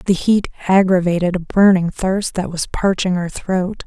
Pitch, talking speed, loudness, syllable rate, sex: 185 Hz, 170 wpm, -17 LUFS, 4.6 syllables/s, female